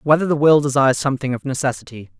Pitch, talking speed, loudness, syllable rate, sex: 140 Hz, 190 wpm, -17 LUFS, 7.2 syllables/s, male